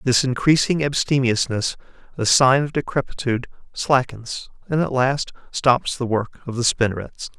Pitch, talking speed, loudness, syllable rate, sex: 130 Hz, 140 wpm, -20 LUFS, 4.7 syllables/s, male